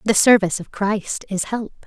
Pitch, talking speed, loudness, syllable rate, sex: 205 Hz, 195 wpm, -19 LUFS, 5.2 syllables/s, female